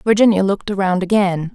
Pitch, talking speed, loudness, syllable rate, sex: 195 Hz, 155 wpm, -16 LUFS, 6.3 syllables/s, female